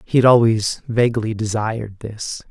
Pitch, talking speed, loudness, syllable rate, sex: 110 Hz, 145 wpm, -18 LUFS, 4.9 syllables/s, male